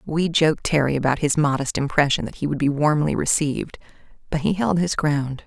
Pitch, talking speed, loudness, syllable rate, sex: 150 Hz, 200 wpm, -21 LUFS, 5.6 syllables/s, female